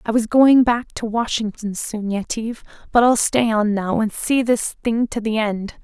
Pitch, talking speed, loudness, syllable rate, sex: 225 Hz, 205 wpm, -19 LUFS, 4.6 syllables/s, female